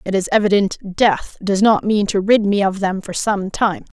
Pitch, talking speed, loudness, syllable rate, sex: 200 Hz, 225 wpm, -17 LUFS, 4.6 syllables/s, female